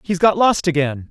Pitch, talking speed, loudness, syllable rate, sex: 170 Hz, 220 wpm, -17 LUFS, 5.0 syllables/s, male